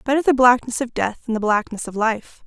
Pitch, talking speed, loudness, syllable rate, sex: 235 Hz, 245 wpm, -19 LUFS, 5.6 syllables/s, female